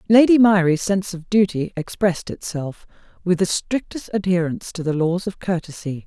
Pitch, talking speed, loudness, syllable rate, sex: 185 Hz, 160 wpm, -20 LUFS, 5.3 syllables/s, female